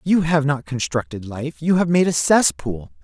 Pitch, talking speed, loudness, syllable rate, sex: 145 Hz, 180 wpm, -19 LUFS, 4.6 syllables/s, male